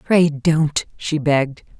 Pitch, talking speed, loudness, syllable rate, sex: 150 Hz, 135 wpm, -19 LUFS, 3.4 syllables/s, female